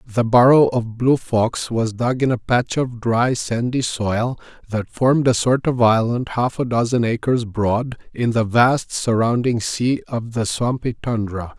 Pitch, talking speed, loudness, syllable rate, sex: 120 Hz, 175 wpm, -19 LUFS, 4.1 syllables/s, male